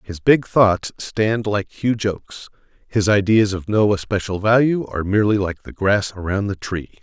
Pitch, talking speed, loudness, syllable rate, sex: 105 Hz, 180 wpm, -19 LUFS, 4.6 syllables/s, male